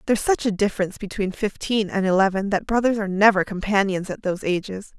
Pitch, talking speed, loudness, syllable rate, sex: 200 Hz, 195 wpm, -22 LUFS, 6.5 syllables/s, female